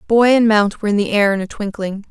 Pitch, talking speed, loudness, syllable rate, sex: 210 Hz, 285 wpm, -16 LUFS, 6.3 syllables/s, female